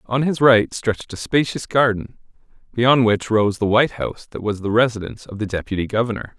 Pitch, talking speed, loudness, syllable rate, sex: 115 Hz, 195 wpm, -19 LUFS, 5.8 syllables/s, male